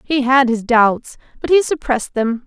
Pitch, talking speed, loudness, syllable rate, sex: 255 Hz, 195 wpm, -15 LUFS, 4.7 syllables/s, female